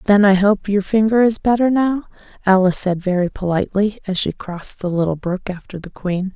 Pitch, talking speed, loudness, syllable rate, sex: 195 Hz, 200 wpm, -18 LUFS, 5.6 syllables/s, female